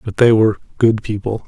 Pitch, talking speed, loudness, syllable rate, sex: 110 Hz, 205 wpm, -16 LUFS, 6.0 syllables/s, male